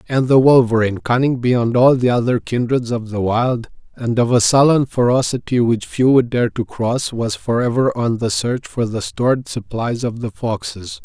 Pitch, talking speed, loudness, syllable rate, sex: 120 Hz, 190 wpm, -17 LUFS, 4.7 syllables/s, male